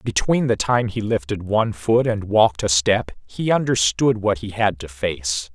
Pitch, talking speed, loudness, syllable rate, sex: 105 Hz, 195 wpm, -20 LUFS, 4.5 syllables/s, male